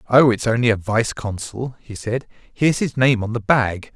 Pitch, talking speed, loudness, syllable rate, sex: 115 Hz, 210 wpm, -20 LUFS, 4.7 syllables/s, male